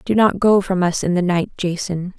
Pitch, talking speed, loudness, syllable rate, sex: 185 Hz, 245 wpm, -18 LUFS, 5.0 syllables/s, female